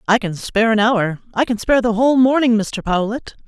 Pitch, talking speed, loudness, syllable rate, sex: 225 Hz, 205 wpm, -17 LUFS, 5.8 syllables/s, female